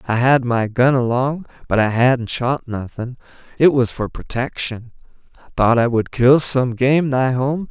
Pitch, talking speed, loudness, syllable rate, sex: 125 Hz, 170 wpm, -17 LUFS, 4.1 syllables/s, male